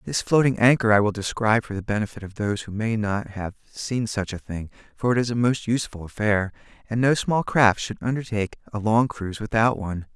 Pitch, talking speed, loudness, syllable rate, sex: 110 Hz, 220 wpm, -23 LUFS, 5.9 syllables/s, male